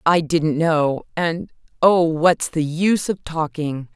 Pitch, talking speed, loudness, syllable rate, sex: 160 Hz, 120 wpm, -19 LUFS, 3.5 syllables/s, female